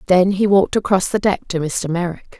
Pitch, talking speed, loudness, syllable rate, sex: 185 Hz, 225 wpm, -17 LUFS, 5.4 syllables/s, female